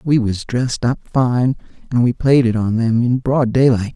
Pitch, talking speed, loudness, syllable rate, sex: 120 Hz, 210 wpm, -16 LUFS, 4.8 syllables/s, male